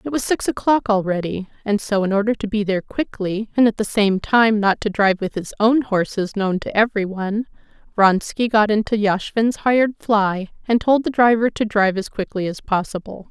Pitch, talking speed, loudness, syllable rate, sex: 210 Hz, 200 wpm, -19 LUFS, 5.3 syllables/s, female